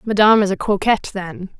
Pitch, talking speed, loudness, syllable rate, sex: 200 Hz, 190 wpm, -17 LUFS, 6.4 syllables/s, female